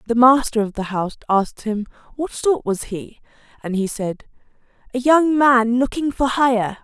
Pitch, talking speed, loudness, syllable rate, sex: 240 Hz, 175 wpm, -19 LUFS, 4.7 syllables/s, female